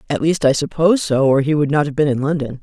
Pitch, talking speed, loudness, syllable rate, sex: 150 Hz, 295 wpm, -16 LUFS, 6.5 syllables/s, female